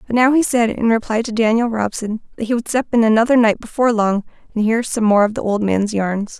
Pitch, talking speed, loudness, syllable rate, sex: 225 Hz, 255 wpm, -17 LUFS, 5.9 syllables/s, female